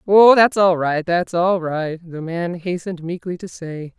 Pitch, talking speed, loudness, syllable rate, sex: 175 Hz, 195 wpm, -18 LUFS, 4.2 syllables/s, female